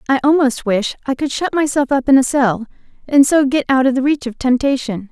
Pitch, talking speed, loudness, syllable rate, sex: 265 Hz, 235 wpm, -15 LUFS, 5.5 syllables/s, female